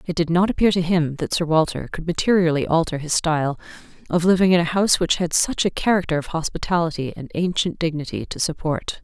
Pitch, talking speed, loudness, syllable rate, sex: 165 Hz, 205 wpm, -21 LUFS, 6.0 syllables/s, female